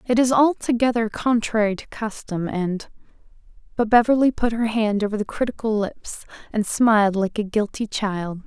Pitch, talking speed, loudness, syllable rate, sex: 220 Hz, 155 wpm, -21 LUFS, 4.9 syllables/s, female